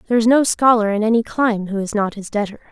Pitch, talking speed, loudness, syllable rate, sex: 220 Hz, 265 wpm, -17 LUFS, 7.0 syllables/s, female